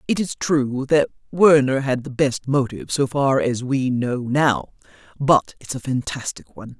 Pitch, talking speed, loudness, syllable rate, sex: 130 Hz, 175 wpm, -20 LUFS, 4.5 syllables/s, female